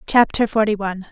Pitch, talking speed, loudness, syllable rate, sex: 210 Hz, 160 wpm, -18 LUFS, 6.3 syllables/s, female